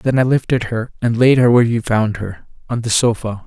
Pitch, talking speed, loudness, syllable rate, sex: 115 Hz, 245 wpm, -16 LUFS, 5.4 syllables/s, male